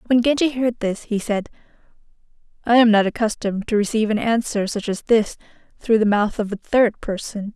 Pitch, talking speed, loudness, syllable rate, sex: 220 Hz, 190 wpm, -20 LUFS, 5.5 syllables/s, female